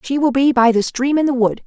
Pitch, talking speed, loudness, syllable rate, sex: 260 Hz, 325 wpm, -16 LUFS, 5.7 syllables/s, female